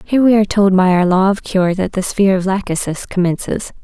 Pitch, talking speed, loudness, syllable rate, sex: 190 Hz, 235 wpm, -15 LUFS, 6.0 syllables/s, female